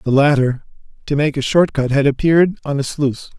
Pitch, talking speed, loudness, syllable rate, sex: 140 Hz, 215 wpm, -16 LUFS, 6.0 syllables/s, male